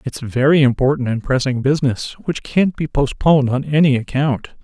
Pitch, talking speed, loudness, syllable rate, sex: 135 Hz, 170 wpm, -17 LUFS, 5.2 syllables/s, male